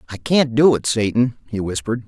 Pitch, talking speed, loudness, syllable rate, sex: 115 Hz, 205 wpm, -18 LUFS, 5.6 syllables/s, male